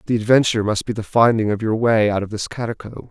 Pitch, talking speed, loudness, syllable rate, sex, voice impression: 110 Hz, 250 wpm, -18 LUFS, 6.5 syllables/s, male, masculine, adult-like, tensed, powerful, soft, slightly muffled, fluent, cool, calm, friendly, wild, lively